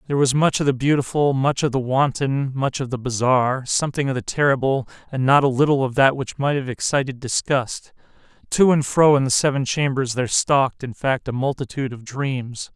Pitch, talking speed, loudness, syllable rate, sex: 135 Hz, 205 wpm, -20 LUFS, 5.5 syllables/s, male